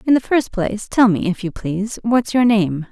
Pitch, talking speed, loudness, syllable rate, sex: 210 Hz, 245 wpm, -18 LUFS, 5.1 syllables/s, female